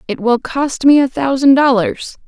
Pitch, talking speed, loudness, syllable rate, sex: 265 Hz, 185 wpm, -13 LUFS, 4.5 syllables/s, female